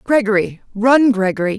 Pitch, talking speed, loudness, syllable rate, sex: 220 Hz, 115 wpm, -15 LUFS, 5.1 syllables/s, female